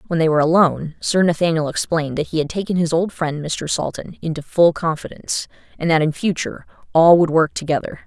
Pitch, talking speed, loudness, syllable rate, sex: 165 Hz, 200 wpm, -19 LUFS, 6.1 syllables/s, female